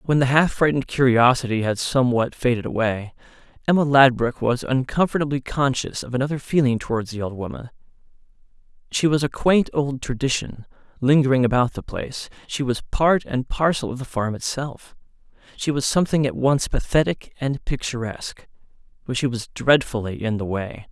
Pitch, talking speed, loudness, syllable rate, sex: 130 Hz, 155 wpm, -21 LUFS, 5.4 syllables/s, male